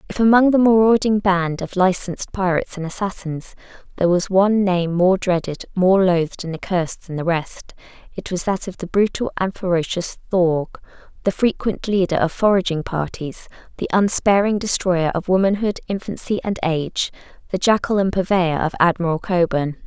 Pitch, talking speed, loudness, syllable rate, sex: 185 Hz, 155 wpm, -19 LUFS, 5.2 syllables/s, female